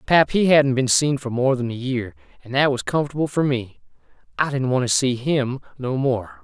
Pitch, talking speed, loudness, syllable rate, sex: 130 Hz, 225 wpm, -21 LUFS, 5.1 syllables/s, male